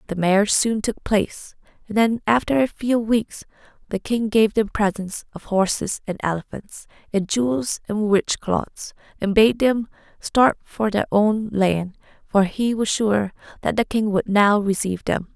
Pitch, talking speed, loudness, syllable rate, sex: 210 Hz, 170 wpm, -21 LUFS, 4.4 syllables/s, female